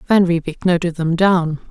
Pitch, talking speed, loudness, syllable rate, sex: 170 Hz, 175 wpm, -17 LUFS, 4.6 syllables/s, female